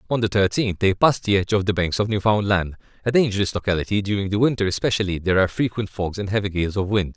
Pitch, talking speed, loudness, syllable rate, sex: 100 Hz, 235 wpm, -21 LUFS, 7.1 syllables/s, male